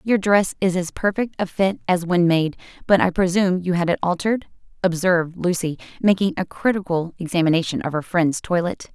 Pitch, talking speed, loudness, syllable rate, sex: 180 Hz, 180 wpm, -21 LUFS, 5.6 syllables/s, female